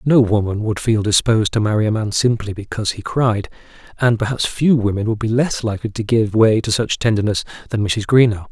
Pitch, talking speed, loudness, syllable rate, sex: 110 Hz, 210 wpm, -17 LUFS, 5.8 syllables/s, male